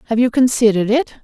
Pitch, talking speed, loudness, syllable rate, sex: 235 Hz, 195 wpm, -15 LUFS, 6.8 syllables/s, female